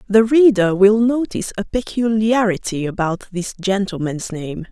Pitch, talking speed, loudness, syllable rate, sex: 205 Hz, 125 wpm, -18 LUFS, 4.6 syllables/s, female